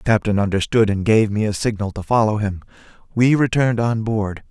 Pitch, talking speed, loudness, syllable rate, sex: 110 Hz, 200 wpm, -19 LUFS, 5.8 syllables/s, male